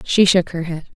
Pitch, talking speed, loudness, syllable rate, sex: 175 Hz, 250 wpm, -17 LUFS, 5.2 syllables/s, female